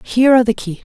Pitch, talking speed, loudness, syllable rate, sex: 230 Hz, 260 wpm, -14 LUFS, 8.3 syllables/s, female